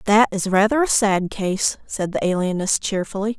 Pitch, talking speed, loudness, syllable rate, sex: 200 Hz, 175 wpm, -20 LUFS, 5.1 syllables/s, female